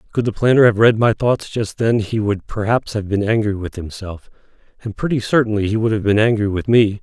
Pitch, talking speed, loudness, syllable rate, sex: 110 Hz, 230 wpm, -17 LUFS, 5.6 syllables/s, male